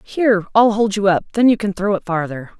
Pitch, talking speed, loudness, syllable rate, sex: 205 Hz, 255 wpm, -17 LUFS, 5.8 syllables/s, female